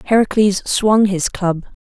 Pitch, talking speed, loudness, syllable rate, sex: 200 Hz, 125 wpm, -16 LUFS, 4.1 syllables/s, female